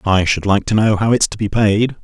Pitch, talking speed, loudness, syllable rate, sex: 105 Hz, 295 wpm, -15 LUFS, 5.4 syllables/s, male